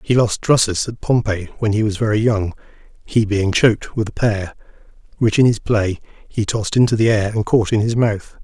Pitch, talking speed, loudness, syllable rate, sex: 110 Hz, 215 wpm, -18 LUFS, 5.4 syllables/s, male